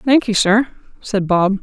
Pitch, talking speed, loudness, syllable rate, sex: 210 Hz, 145 wpm, -16 LUFS, 3.9 syllables/s, female